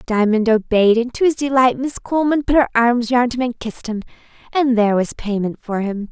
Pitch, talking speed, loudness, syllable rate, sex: 240 Hz, 215 wpm, -17 LUFS, 5.6 syllables/s, female